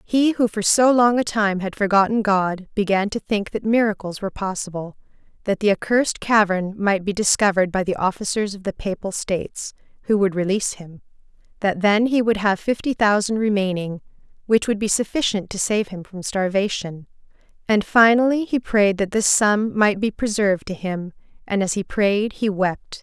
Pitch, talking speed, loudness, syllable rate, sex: 205 Hz, 180 wpm, -20 LUFS, 5.1 syllables/s, female